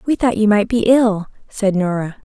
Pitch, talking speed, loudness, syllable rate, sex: 210 Hz, 210 wpm, -16 LUFS, 4.7 syllables/s, female